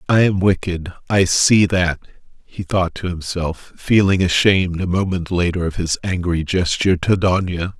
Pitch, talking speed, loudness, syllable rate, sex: 90 Hz, 160 wpm, -18 LUFS, 4.6 syllables/s, male